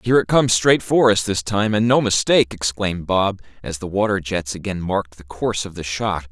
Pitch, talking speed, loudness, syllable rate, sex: 95 Hz, 230 wpm, -19 LUFS, 5.7 syllables/s, male